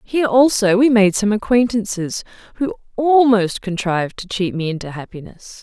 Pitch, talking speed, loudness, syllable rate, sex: 210 Hz, 150 wpm, -17 LUFS, 5.0 syllables/s, female